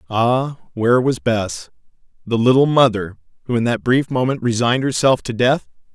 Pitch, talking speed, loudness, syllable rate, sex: 120 Hz, 160 wpm, -17 LUFS, 5.0 syllables/s, male